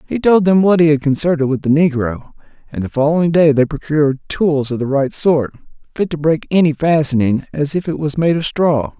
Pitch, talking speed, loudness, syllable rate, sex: 150 Hz, 220 wpm, -15 LUFS, 5.4 syllables/s, male